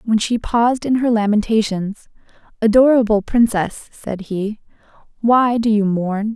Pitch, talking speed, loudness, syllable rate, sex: 220 Hz, 130 wpm, -17 LUFS, 4.4 syllables/s, female